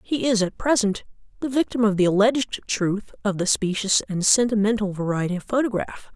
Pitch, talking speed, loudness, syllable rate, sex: 210 Hz, 175 wpm, -22 LUFS, 5.5 syllables/s, female